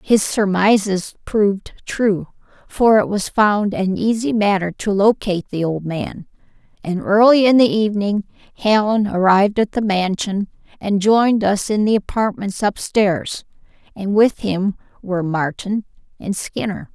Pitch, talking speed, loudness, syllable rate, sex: 200 Hz, 140 wpm, -18 LUFS, 4.3 syllables/s, female